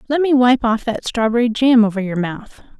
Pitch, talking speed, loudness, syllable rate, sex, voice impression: 235 Hz, 215 wpm, -16 LUFS, 5.2 syllables/s, female, very feminine, adult-like, slightly middle-aged, thin, tensed, slightly powerful, slightly bright, hard, slightly muffled, fluent, slightly cute, intellectual, slightly refreshing, sincere, slightly calm, slightly friendly, slightly reassuring, very unique, slightly elegant, wild, slightly sweet, slightly lively, strict, slightly intense, sharp